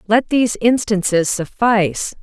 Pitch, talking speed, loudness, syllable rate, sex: 215 Hz, 110 wpm, -16 LUFS, 4.5 syllables/s, female